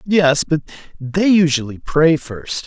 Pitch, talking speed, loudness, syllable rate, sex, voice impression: 155 Hz, 115 wpm, -16 LUFS, 3.6 syllables/s, male, masculine, adult-like, tensed, powerful, bright, raspy, intellectual, slightly mature, friendly, wild, lively, slightly light